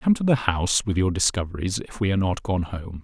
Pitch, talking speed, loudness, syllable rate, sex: 100 Hz, 255 wpm, -23 LUFS, 6.3 syllables/s, male